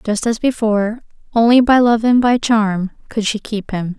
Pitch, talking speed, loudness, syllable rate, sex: 220 Hz, 195 wpm, -16 LUFS, 4.8 syllables/s, female